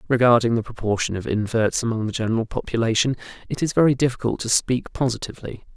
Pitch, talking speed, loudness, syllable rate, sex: 115 Hz, 165 wpm, -22 LUFS, 6.6 syllables/s, male